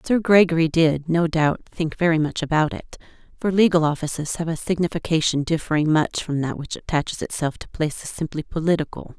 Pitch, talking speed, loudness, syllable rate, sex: 160 Hz, 175 wpm, -22 LUFS, 5.6 syllables/s, female